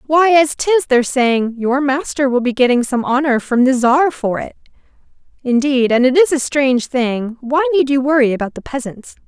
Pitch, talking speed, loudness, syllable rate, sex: 255 Hz, 200 wpm, -15 LUFS, 5.1 syllables/s, female